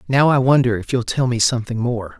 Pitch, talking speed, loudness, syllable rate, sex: 120 Hz, 245 wpm, -18 LUFS, 5.9 syllables/s, male